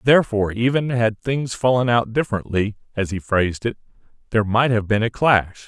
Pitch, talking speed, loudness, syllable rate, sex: 115 Hz, 180 wpm, -20 LUFS, 5.7 syllables/s, male